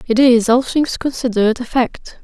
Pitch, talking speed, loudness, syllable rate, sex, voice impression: 245 Hz, 190 wpm, -16 LUFS, 4.8 syllables/s, female, feminine, adult-like, slightly tensed, slightly powerful, bright, soft, slightly muffled, slightly raspy, friendly, slightly reassuring, elegant, lively, slightly modest